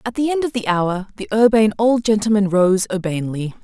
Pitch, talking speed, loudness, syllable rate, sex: 210 Hz, 200 wpm, -18 LUFS, 5.9 syllables/s, female